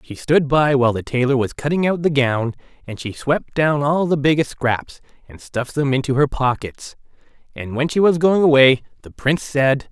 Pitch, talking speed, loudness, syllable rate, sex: 140 Hz, 205 wpm, -18 LUFS, 5.1 syllables/s, male